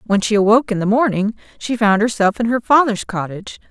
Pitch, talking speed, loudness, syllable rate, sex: 220 Hz, 210 wpm, -16 LUFS, 6.1 syllables/s, female